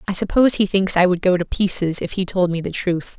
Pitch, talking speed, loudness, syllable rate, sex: 185 Hz, 285 wpm, -18 LUFS, 6.0 syllables/s, female